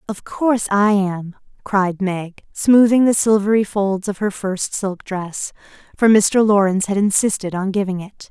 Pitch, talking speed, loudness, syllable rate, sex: 200 Hz, 165 wpm, -17 LUFS, 4.4 syllables/s, female